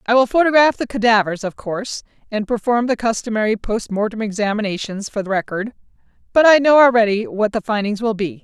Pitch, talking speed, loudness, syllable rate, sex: 220 Hz, 185 wpm, -17 LUFS, 5.9 syllables/s, female